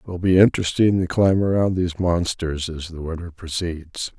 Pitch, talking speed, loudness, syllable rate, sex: 85 Hz, 185 wpm, -21 LUFS, 5.2 syllables/s, male